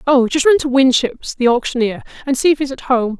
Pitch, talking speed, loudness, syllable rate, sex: 265 Hz, 245 wpm, -15 LUFS, 5.7 syllables/s, female